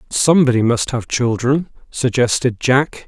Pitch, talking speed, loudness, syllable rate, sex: 130 Hz, 115 wpm, -16 LUFS, 4.5 syllables/s, male